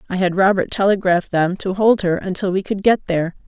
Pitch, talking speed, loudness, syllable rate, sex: 190 Hz, 225 wpm, -18 LUFS, 5.8 syllables/s, female